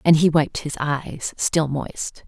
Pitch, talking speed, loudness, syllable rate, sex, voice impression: 150 Hz, 185 wpm, -22 LUFS, 3.3 syllables/s, female, very feminine, adult-like, slightly soft, calm, sweet